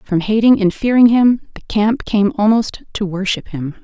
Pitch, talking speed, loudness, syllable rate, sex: 210 Hz, 190 wpm, -15 LUFS, 4.6 syllables/s, female